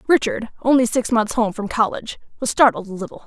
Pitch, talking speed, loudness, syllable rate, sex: 225 Hz, 200 wpm, -19 LUFS, 6.0 syllables/s, female